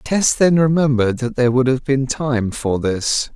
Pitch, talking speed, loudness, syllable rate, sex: 130 Hz, 195 wpm, -17 LUFS, 4.6 syllables/s, male